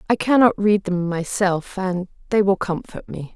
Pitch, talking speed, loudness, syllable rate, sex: 190 Hz, 160 wpm, -20 LUFS, 4.4 syllables/s, female